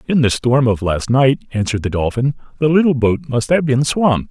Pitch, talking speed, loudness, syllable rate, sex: 130 Hz, 225 wpm, -16 LUFS, 5.5 syllables/s, male